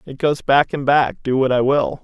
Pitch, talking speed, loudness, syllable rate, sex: 135 Hz, 265 wpm, -17 LUFS, 4.7 syllables/s, male